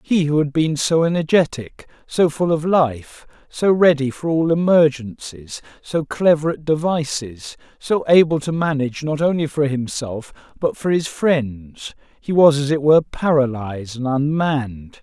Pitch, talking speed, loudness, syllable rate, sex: 145 Hz, 155 wpm, -18 LUFS, 4.4 syllables/s, male